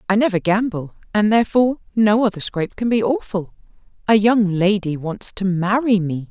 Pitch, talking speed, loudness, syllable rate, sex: 205 Hz, 170 wpm, -18 LUFS, 5.3 syllables/s, female